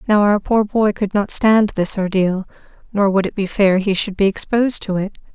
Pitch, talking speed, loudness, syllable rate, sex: 200 Hz, 225 wpm, -17 LUFS, 5.0 syllables/s, female